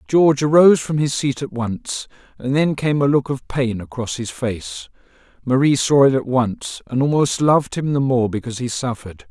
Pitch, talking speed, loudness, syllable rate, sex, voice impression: 130 Hz, 200 wpm, -18 LUFS, 5.1 syllables/s, male, masculine, adult-like, sincere